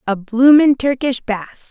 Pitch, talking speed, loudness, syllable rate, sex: 250 Hz, 140 wpm, -14 LUFS, 3.8 syllables/s, female